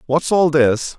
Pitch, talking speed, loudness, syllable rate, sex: 150 Hz, 180 wpm, -16 LUFS, 3.6 syllables/s, male